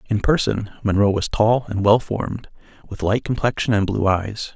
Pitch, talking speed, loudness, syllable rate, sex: 105 Hz, 185 wpm, -20 LUFS, 4.9 syllables/s, male